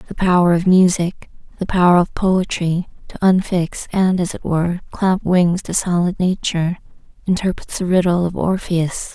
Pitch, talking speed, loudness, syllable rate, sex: 180 Hz, 155 wpm, -17 LUFS, 4.6 syllables/s, female